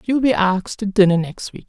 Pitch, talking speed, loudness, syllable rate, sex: 200 Hz, 250 wpm, -18 LUFS, 5.7 syllables/s, female